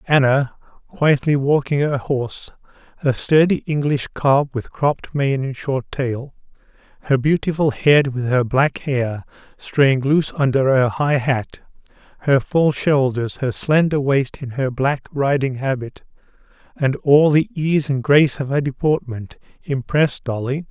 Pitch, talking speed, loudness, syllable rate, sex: 135 Hz, 145 wpm, -19 LUFS, 4.2 syllables/s, male